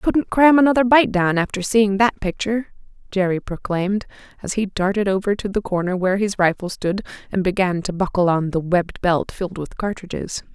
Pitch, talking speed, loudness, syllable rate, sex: 195 Hz, 190 wpm, -20 LUFS, 5.5 syllables/s, female